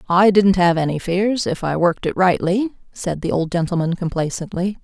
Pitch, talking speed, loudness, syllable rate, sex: 180 Hz, 185 wpm, -19 LUFS, 5.2 syllables/s, female